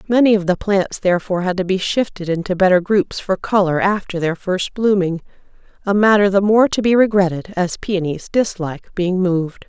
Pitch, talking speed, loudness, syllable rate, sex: 190 Hz, 185 wpm, -17 LUFS, 5.3 syllables/s, female